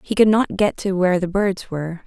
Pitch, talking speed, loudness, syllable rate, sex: 190 Hz, 260 wpm, -19 LUFS, 5.7 syllables/s, female